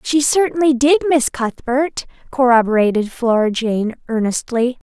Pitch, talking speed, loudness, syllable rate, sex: 255 Hz, 110 wpm, -16 LUFS, 4.4 syllables/s, female